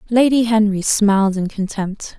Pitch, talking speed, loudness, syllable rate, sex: 210 Hz, 135 wpm, -17 LUFS, 4.5 syllables/s, female